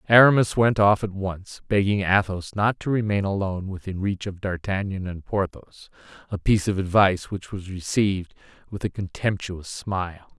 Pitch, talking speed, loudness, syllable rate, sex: 95 Hz, 160 wpm, -23 LUFS, 5.1 syllables/s, male